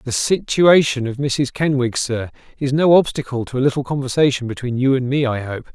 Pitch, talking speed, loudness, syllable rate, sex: 130 Hz, 200 wpm, -18 LUFS, 5.6 syllables/s, male